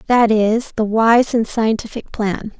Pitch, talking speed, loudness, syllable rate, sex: 225 Hz, 160 wpm, -16 LUFS, 3.9 syllables/s, female